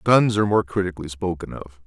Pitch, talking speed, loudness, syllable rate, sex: 90 Hz, 195 wpm, -22 LUFS, 6.4 syllables/s, male